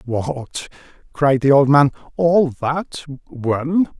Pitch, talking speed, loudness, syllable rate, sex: 145 Hz, 90 wpm, -17 LUFS, 2.5 syllables/s, male